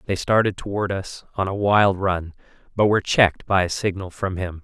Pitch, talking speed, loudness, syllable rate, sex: 95 Hz, 205 wpm, -21 LUFS, 5.3 syllables/s, male